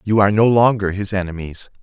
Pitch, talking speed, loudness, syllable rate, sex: 100 Hz, 200 wpm, -17 LUFS, 6.2 syllables/s, male